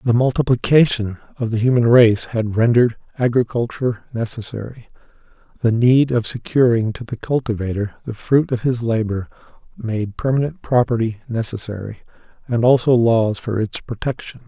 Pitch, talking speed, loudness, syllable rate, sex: 115 Hz, 135 wpm, -18 LUFS, 5.2 syllables/s, male